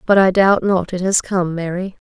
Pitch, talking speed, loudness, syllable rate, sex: 185 Hz, 230 wpm, -17 LUFS, 4.8 syllables/s, female